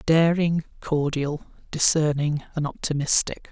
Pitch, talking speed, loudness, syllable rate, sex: 155 Hz, 85 wpm, -23 LUFS, 4.1 syllables/s, male